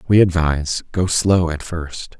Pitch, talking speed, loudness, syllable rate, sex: 85 Hz, 165 wpm, -18 LUFS, 4.2 syllables/s, male